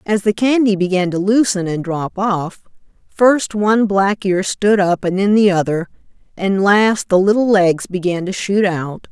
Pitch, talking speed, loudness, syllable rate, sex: 195 Hz, 185 wpm, -15 LUFS, 4.3 syllables/s, female